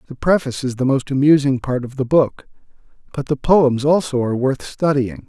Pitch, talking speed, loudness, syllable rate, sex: 135 Hz, 195 wpm, -18 LUFS, 5.5 syllables/s, male